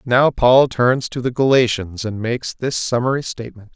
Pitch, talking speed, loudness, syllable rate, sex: 120 Hz, 175 wpm, -17 LUFS, 5.0 syllables/s, male